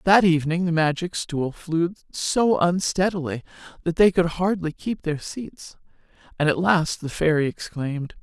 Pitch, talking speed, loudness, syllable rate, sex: 170 Hz, 155 wpm, -23 LUFS, 4.5 syllables/s, female